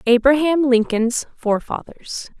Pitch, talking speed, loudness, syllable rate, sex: 255 Hz, 75 wpm, -19 LUFS, 4.3 syllables/s, female